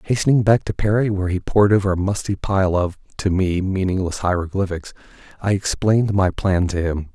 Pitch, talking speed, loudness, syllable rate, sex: 95 Hz, 185 wpm, -20 LUFS, 5.6 syllables/s, male